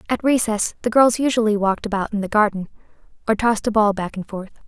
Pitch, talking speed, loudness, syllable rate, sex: 215 Hz, 220 wpm, -19 LUFS, 6.5 syllables/s, female